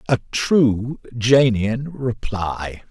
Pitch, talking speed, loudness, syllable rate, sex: 120 Hz, 85 wpm, -20 LUFS, 2.5 syllables/s, male